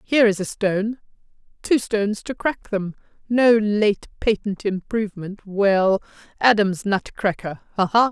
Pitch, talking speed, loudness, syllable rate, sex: 205 Hz, 120 wpm, -21 LUFS, 4.4 syllables/s, female